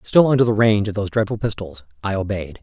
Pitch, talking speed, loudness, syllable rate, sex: 105 Hz, 230 wpm, -19 LUFS, 6.8 syllables/s, male